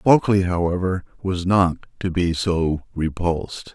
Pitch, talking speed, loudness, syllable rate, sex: 90 Hz, 130 wpm, -21 LUFS, 4.3 syllables/s, male